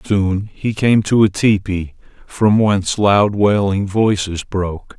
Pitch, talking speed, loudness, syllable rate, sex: 100 Hz, 145 wpm, -16 LUFS, 3.7 syllables/s, male